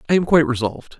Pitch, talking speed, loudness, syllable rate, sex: 145 Hz, 240 wpm, -18 LUFS, 8.9 syllables/s, male